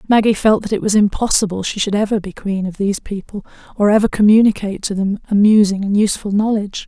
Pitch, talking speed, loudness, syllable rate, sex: 205 Hz, 200 wpm, -16 LUFS, 6.5 syllables/s, female